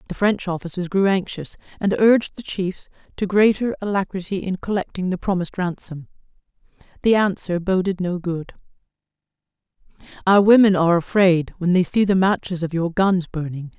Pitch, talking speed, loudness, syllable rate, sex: 185 Hz, 150 wpm, -20 LUFS, 5.4 syllables/s, female